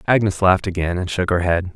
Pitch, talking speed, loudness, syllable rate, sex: 90 Hz, 240 wpm, -19 LUFS, 6.2 syllables/s, male